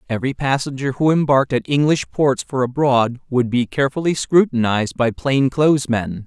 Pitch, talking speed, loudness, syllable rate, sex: 135 Hz, 165 wpm, -18 LUFS, 5.4 syllables/s, male